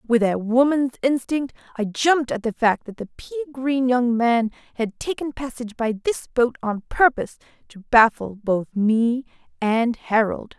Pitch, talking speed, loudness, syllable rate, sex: 240 Hz, 165 wpm, -21 LUFS, 4.5 syllables/s, female